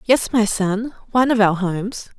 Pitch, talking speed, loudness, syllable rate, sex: 215 Hz, 195 wpm, -19 LUFS, 4.9 syllables/s, female